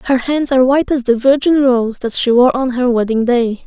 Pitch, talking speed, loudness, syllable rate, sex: 250 Hz, 245 wpm, -14 LUFS, 5.4 syllables/s, female